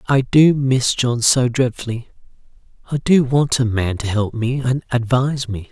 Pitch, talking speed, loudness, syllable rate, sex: 125 Hz, 180 wpm, -17 LUFS, 4.4 syllables/s, male